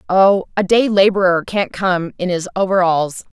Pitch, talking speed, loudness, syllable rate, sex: 185 Hz, 160 wpm, -16 LUFS, 4.6 syllables/s, female